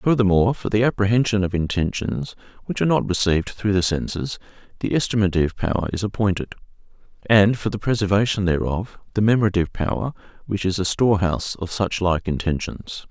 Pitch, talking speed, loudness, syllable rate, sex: 100 Hz, 155 wpm, -21 LUFS, 6.1 syllables/s, male